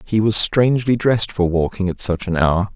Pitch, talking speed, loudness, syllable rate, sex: 100 Hz, 220 wpm, -17 LUFS, 5.3 syllables/s, male